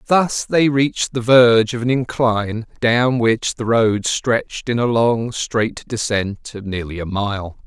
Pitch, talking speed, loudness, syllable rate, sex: 115 Hz, 170 wpm, -18 LUFS, 4.0 syllables/s, male